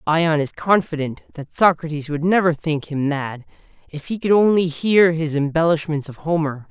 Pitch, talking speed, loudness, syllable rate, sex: 160 Hz, 170 wpm, -19 LUFS, 4.8 syllables/s, male